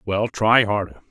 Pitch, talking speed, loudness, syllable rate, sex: 105 Hz, 160 wpm, -19 LUFS, 4.4 syllables/s, male